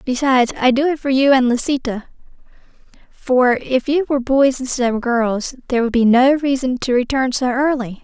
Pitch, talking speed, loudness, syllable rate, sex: 255 Hz, 185 wpm, -16 LUFS, 5.3 syllables/s, female